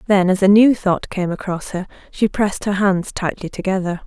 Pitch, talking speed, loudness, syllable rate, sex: 190 Hz, 205 wpm, -18 LUFS, 5.2 syllables/s, female